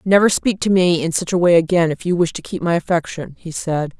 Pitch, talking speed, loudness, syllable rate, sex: 175 Hz, 270 wpm, -17 LUFS, 5.8 syllables/s, female